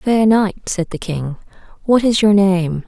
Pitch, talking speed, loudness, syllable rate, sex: 195 Hz, 190 wpm, -16 LUFS, 4.3 syllables/s, female